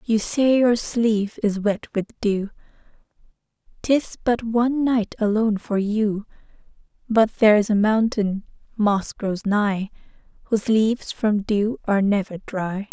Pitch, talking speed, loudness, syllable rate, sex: 215 Hz, 135 wpm, -21 LUFS, 4.2 syllables/s, female